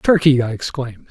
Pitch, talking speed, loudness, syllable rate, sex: 135 Hz, 165 wpm, -18 LUFS, 6.3 syllables/s, male